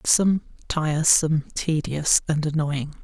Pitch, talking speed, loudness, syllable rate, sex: 155 Hz, 100 wpm, -22 LUFS, 4.7 syllables/s, male